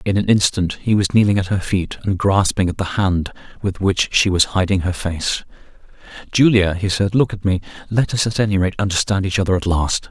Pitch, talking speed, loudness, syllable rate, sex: 95 Hz, 220 wpm, -18 LUFS, 5.5 syllables/s, male